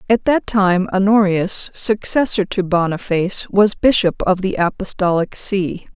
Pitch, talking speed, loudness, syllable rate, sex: 195 Hz, 130 wpm, -17 LUFS, 4.3 syllables/s, female